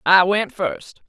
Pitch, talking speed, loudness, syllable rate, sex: 190 Hz, 165 wpm, -19 LUFS, 3.3 syllables/s, female